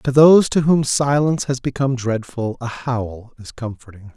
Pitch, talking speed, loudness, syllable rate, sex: 125 Hz, 175 wpm, -18 LUFS, 5.0 syllables/s, male